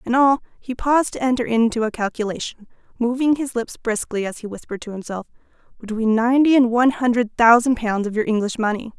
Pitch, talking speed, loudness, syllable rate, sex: 235 Hz, 185 wpm, -20 LUFS, 6.2 syllables/s, female